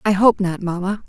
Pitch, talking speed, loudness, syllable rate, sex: 195 Hz, 220 wpm, -19 LUFS, 5.2 syllables/s, female